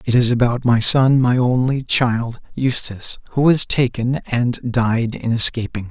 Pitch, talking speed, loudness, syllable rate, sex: 120 Hz, 165 wpm, -17 LUFS, 4.2 syllables/s, male